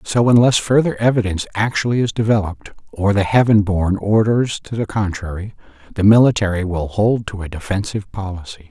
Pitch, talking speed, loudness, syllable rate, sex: 100 Hz, 160 wpm, -17 LUFS, 5.7 syllables/s, male